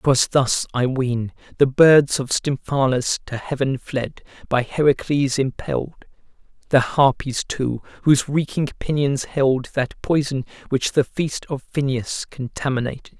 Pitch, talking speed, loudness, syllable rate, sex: 135 Hz, 130 wpm, -21 LUFS, 4.1 syllables/s, male